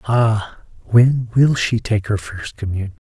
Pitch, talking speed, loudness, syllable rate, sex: 110 Hz, 155 wpm, -18 LUFS, 4.0 syllables/s, male